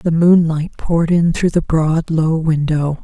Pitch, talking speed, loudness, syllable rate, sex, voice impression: 160 Hz, 180 wpm, -15 LUFS, 4.1 syllables/s, female, feminine, adult-like, slightly soft, slightly sincere, calm, slightly kind